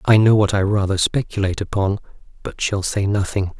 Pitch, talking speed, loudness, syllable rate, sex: 100 Hz, 185 wpm, -19 LUFS, 5.7 syllables/s, male